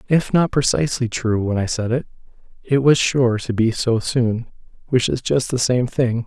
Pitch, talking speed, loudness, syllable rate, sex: 120 Hz, 200 wpm, -19 LUFS, 4.7 syllables/s, male